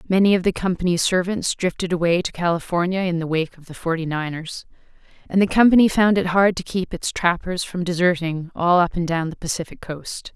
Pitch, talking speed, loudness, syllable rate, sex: 175 Hz, 205 wpm, -21 LUFS, 5.6 syllables/s, female